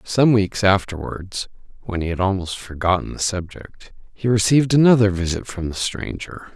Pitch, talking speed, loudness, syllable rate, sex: 100 Hz, 155 wpm, -20 LUFS, 4.9 syllables/s, male